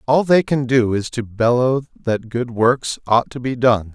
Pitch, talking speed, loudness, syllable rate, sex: 120 Hz, 215 wpm, -18 LUFS, 4.0 syllables/s, male